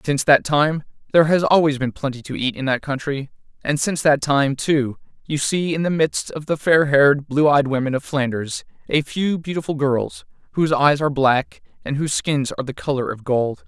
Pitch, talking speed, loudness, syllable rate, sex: 145 Hz, 210 wpm, -20 LUFS, 5.4 syllables/s, male